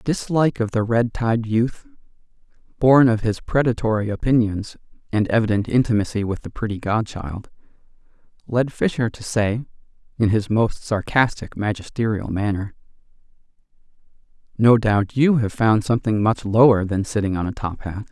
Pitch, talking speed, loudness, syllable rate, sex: 110 Hz, 140 wpm, -20 LUFS, 4.9 syllables/s, male